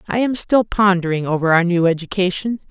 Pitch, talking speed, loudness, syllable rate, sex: 190 Hz, 175 wpm, -17 LUFS, 5.7 syllables/s, female